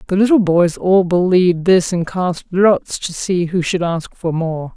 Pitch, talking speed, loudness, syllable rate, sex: 180 Hz, 200 wpm, -16 LUFS, 4.2 syllables/s, female